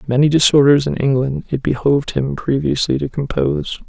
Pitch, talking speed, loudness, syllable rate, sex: 140 Hz, 155 wpm, -16 LUFS, 5.5 syllables/s, male